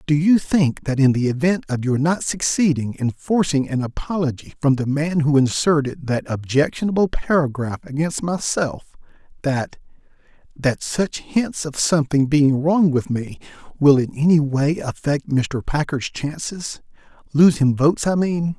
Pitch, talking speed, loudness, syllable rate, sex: 150 Hz, 145 wpm, -20 LUFS, 4.5 syllables/s, male